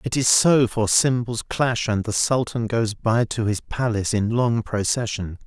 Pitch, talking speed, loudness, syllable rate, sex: 115 Hz, 185 wpm, -21 LUFS, 4.3 syllables/s, male